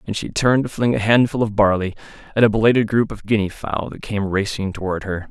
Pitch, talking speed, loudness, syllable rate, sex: 105 Hz, 240 wpm, -19 LUFS, 6.1 syllables/s, male